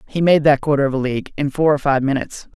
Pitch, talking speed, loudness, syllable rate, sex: 140 Hz, 280 wpm, -17 LUFS, 7.0 syllables/s, male